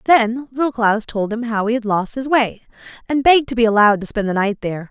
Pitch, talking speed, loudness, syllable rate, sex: 230 Hz, 255 wpm, -17 LUFS, 6.1 syllables/s, female